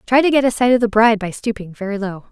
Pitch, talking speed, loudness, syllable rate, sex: 220 Hz, 310 wpm, -17 LUFS, 6.9 syllables/s, female